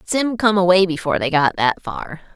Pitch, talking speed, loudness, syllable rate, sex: 180 Hz, 205 wpm, -17 LUFS, 5.3 syllables/s, female